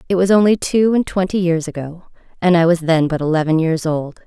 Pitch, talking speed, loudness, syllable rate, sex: 170 Hz, 225 wpm, -16 LUFS, 5.6 syllables/s, female